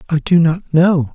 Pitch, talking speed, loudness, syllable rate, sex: 165 Hz, 210 wpm, -14 LUFS, 4.2 syllables/s, male